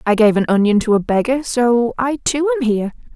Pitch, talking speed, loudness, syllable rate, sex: 240 Hz, 230 wpm, -16 LUFS, 5.6 syllables/s, female